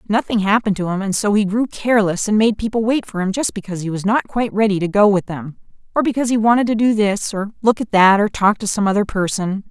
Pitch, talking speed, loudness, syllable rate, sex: 210 Hz, 265 wpm, -17 LUFS, 6.4 syllables/s, female